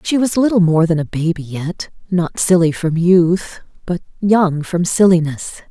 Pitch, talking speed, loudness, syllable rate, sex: 175 Hz, 170 wpm, -16 LUFS, 4.3 syllables/s, female